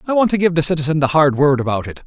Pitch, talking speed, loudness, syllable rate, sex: 155 Hz, 320 wpm, -16 LUFS, 7.3 syllables/s, male